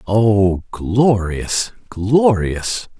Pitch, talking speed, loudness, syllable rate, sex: 105 Hz, 60 wpm, -17 LUFS, 2.0 syllables/s, male